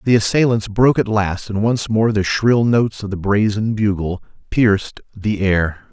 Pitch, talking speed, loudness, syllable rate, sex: 105 Hz, 180 wpm, -17 LUFS, 4.7 syllables/s, male